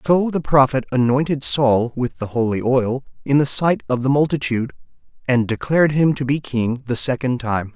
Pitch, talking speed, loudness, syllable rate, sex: 130 Hz, 185 wpm, -19 LUFS, 5.1 syllables/s, male